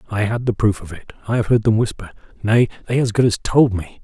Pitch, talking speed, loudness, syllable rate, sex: 110 Hz, 270 wpm, -18 LUFS, 6.0 syllables/s, male